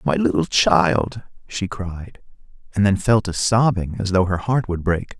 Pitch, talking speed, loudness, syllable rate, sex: 95 Hz, 185 wpm, -20 LUFS, 4.2 syllables/s, male